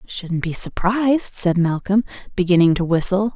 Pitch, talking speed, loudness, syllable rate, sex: 190 Hz, 145 wpm, -19 LUFS, 4.8 syllables/s, female